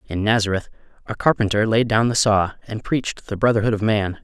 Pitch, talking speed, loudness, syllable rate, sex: 105 Hz, 200 wpm, -20 LUFS, 5.8 syllables/s, male